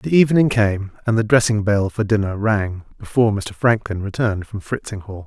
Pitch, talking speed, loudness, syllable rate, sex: 105 Hz, 180 wpm, -19 LUFS, 5.4 syllables/s, male